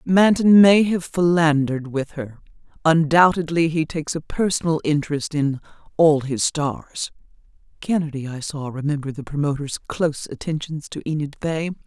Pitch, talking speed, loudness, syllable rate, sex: 155 Hz, 135 wpm, -20 LUFS, 5.0 syllables/s, female